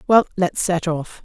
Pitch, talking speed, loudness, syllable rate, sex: 175 Hz, 195 wpm, -20 LUFS, 4.2 syllables/s, female